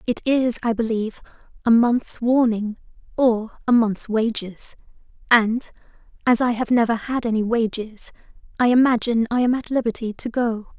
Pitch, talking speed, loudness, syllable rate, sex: 230 Hz, 150 wpm, -21 LUFS, 4.9 syllables/s, female